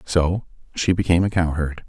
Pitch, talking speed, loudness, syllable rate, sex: 85 Hz, 160 wpm, -21 LUFS, 5.4 syllables/s, male